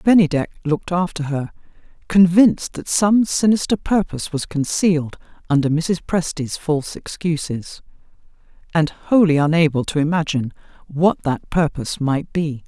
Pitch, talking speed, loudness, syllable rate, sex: 165 Hz, 125 wpm, -19 LUFS, 4.9 syllables/s, female